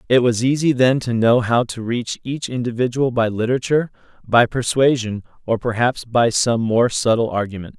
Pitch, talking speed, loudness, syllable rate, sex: 120 Hz, 170 wpm, -18 LUFS, 5.1 syllables/s, male